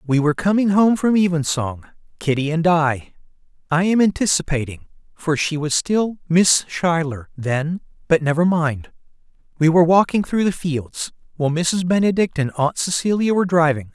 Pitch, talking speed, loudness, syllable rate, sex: 165 Hz, 155 wpm, -19 LUFS, 4.9 syllables/s, male